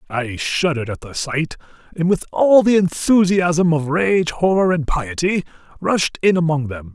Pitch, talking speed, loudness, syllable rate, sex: 165 Hz, 165 wpm, -18 LUFS, 4.4 syllables/s, male